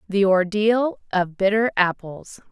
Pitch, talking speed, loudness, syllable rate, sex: 200 Hz, 120 wpm, -20 LUFS, 3.8 syllables/s, female